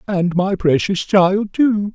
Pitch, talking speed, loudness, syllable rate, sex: 195 Hz, 155 wpm, -16 LUFS, 3.3 syllables/s, male